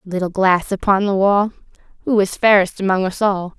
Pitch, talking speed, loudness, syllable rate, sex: 195 Hz, 185 wpm, -17 LUFS, 5.1 syllables/s, female